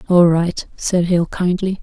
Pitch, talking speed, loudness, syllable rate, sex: 175 Hz, 165 wpm, -17 LUFS, 3.8 syllables/s, female